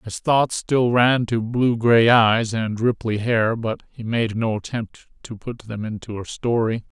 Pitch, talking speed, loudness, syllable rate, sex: 115 Hz, 190 wpm, -20 LUFS, 4.0 syllables/s, male